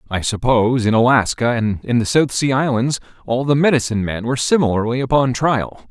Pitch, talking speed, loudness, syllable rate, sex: 125 Hz, 185 wpm, -17 LUFS, 5.8 syllables/s, male